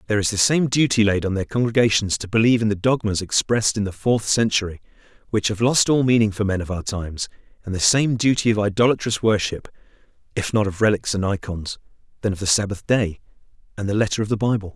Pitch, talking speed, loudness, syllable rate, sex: 105 Hz, 215 wpm, -20 LUFS, 6.4 syllables/s, male